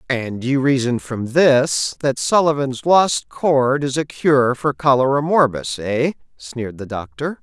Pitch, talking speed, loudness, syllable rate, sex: 135 Hz, 155 wpm, -18 LUFS, 3.9 syllables/s, male